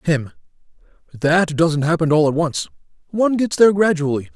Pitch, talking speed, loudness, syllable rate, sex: 160 Hz, 140 wpm, -17 LUFS, 5.4 syllables/s, male